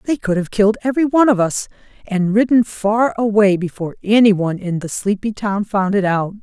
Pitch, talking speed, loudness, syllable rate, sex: 205 Hz, 195 wpm, -17 LUFS, 5.7 syllables/s, female